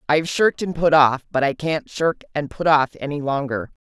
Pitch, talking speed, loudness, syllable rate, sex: 150 Hz, 215 wpm, -20 LUFS, 5.3 syllables/s, female